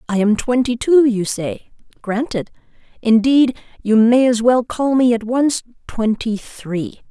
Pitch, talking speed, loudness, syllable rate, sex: 235 Hz, 150 wpm, -17 LUFS, 3.9 syllables/s, female